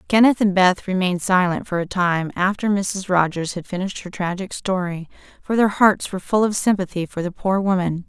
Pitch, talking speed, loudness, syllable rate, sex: 190 Hz, 200 wpm, -20 LUFS, 5.4 syllables/s, female